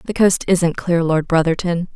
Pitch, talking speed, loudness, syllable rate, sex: 170 Hz, 185 wpm, -17 LUFS, 4.7 syllables/s, female